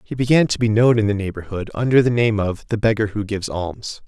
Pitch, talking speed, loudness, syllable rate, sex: 110 Hz, 250 wpm, -19 LUFS, 6.0 syllables/s, male